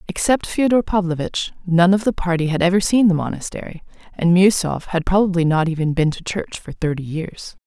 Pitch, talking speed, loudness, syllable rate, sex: 180 Hz, 190 wpm, -18 LUFS, 5.5 syllables/s, female